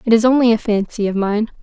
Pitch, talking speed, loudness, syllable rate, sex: 220 Hz, 260 wpm, -16 LUFS, 6.4 syllables/s, female